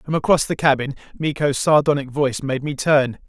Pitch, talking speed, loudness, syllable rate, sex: 140 Hz, 185 wpm, -19 LUFS, 5.5 syllables/s, male